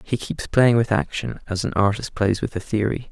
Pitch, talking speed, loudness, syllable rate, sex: 110 Hz, 230 wpm, -22 LUFS, 5.1 syllables/s, male